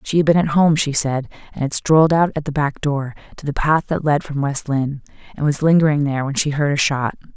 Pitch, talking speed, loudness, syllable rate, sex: 145 Hz, 260 wpm, -18 LUFS, 5.9 syllables/s, female